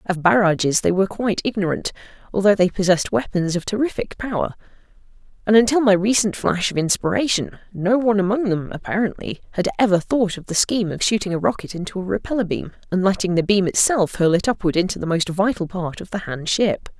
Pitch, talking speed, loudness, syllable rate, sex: 195 Hz, 200 wpm, -20 LUFS, 6.1 syllables/s, female